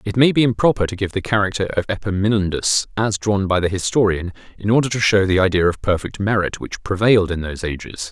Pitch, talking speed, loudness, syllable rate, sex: 100 Hz, 215 wpm, -19 LUFS, 6.1 syllables/s, male